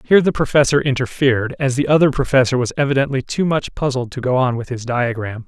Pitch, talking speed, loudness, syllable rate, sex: 130 Hz, 210 wpm, -17 LUFS, 6.2 syllables/s, male